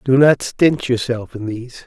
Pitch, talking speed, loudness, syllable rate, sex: 125 Hz, 195 wpm, -17 LUFS, 4.5 syllables/s, male